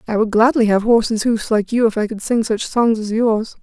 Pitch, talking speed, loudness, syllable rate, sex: 220 Hz, 265 wpm, -17 LUFS, 5.3 syllables/s, female